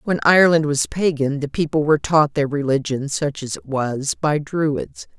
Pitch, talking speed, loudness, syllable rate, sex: 150 Hz, 185 wpm, -19 LUFS, 4.6 syllables/s, female